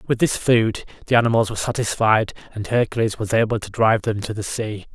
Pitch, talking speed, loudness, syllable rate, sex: 110 Hz, 205 wpm, -20 LUFS, 6.1 syllables/s, male